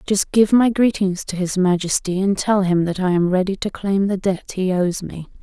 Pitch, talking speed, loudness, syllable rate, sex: 190 Hz, 230 wpm, -19 LUFS, 4.8 syllables/s, female